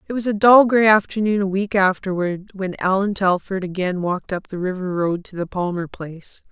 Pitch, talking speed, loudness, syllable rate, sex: 190 Hz, 205 wpm, -19 LUFS, 5.2 syllables/s, female